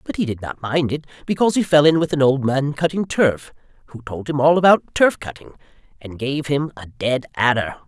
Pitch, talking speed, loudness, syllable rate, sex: 145 Hz, 220 wpm, -19 LUFS, 5.4 syllables/s, male